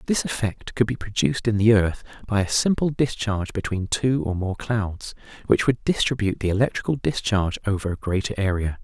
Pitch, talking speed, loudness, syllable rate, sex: 105 Hz, 185 wpm, -23 LUFS, 5.6 syllables/s, male